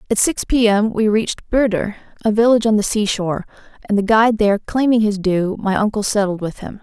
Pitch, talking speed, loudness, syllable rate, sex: 210 Hz, 210 wpm, -17 LUFS, 6.1 syllables/s, female